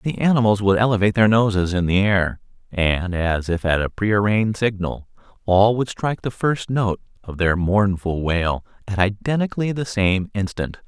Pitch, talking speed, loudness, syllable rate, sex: 100 Hz, 170 wpm, -20 LUFS, 4.9 syllables/s, male